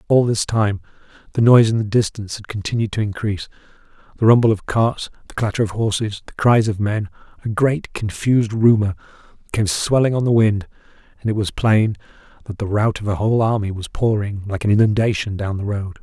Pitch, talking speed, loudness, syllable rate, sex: 105 Hz, 195 wpm, -19 LUFS, 5.8 syllables/s, male